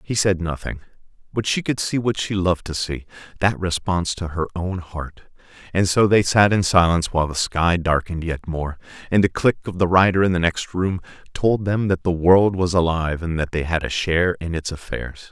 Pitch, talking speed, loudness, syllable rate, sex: 90 Hz, 220 wpm, -20 LUFS, 5.3 syllables/s, male